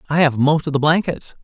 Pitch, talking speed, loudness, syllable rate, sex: 150 Hz, 250 wpm, -17 LUFS, 5.9 syllables/s, male